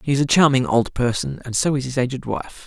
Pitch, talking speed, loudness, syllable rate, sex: 135 Hz, 270 wpm, -20 LUFS, 5.9 syllables/s, male